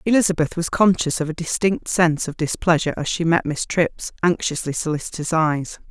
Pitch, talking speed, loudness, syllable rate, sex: 165 Hz, 175 wpm, -20 LUFS, 5.6 syllables/s, female